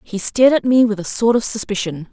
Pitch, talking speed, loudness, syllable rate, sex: 220 Hz, 255 wpm, -16 LUFS, 6.0 syllables/s, female